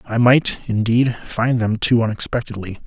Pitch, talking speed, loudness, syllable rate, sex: 115 Hz, 145 wpm, -18 LUFS, 4.8 syllables/s, male